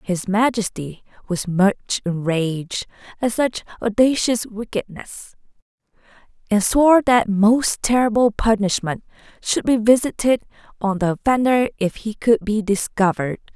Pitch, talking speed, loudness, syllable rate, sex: 215 Hz, 115 wpm, -19 LUFS, 4.3 syllables/s, female